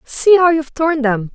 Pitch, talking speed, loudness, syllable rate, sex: 290 Hz, 225 wpm, -14 LUFS, 4.8 syllables/s, female